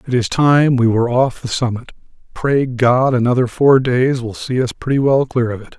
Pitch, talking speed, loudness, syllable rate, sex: 125 Hz, 210 wpm, -15 LUFS, 5.0 syllables/s, male